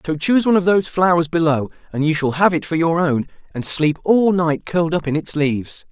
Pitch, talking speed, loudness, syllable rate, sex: 165 Hz, 245 wpm, -18 LUFS, 6.0 syllables/s, male